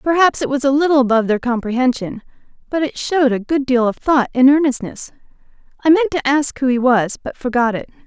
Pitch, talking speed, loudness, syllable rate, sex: 265 Hz, 210 wpm, -16 LUFS, 5.9 syllables/s, female